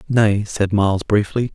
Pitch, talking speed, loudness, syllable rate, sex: 105 Hz, 155 wpm, -18 LUFS, 4.5 syllables/s, male